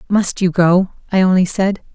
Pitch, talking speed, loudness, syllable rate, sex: 185 Hz, 185 wpm, -15 LUFS, 4.6 syllables/s, female